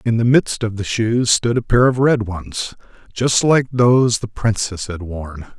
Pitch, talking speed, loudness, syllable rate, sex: 110 Hz, 205 wpm, -17 LUFS, 4.2 syllables/s, male